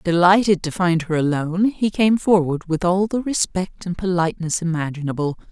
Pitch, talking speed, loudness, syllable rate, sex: 180 Hz, 165 wpm, -20 LUFS, 5.3 syllables/s, female